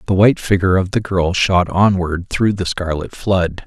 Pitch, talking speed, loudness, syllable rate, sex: 95 Hz, 195 wpm, -16 LUFS, 4.9 syllables/s, male